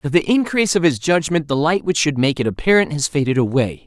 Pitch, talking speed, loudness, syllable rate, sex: 155 Hz, 250 wpm, -17 LUFS, 6.0 syllables/s, male